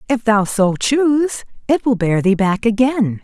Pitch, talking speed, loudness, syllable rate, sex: 230 Hz, 185 wpm, -16 LUFS, 4.2 syllables/s, female